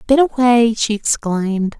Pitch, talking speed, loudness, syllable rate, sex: 230 Hz, 135 wpm, -15 LUFS, 4.5 syllables/s, female